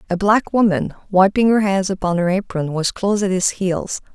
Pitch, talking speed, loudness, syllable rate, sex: 190 Hz, 205 wpm, -18 LUFS, 5.1 syllables/s, female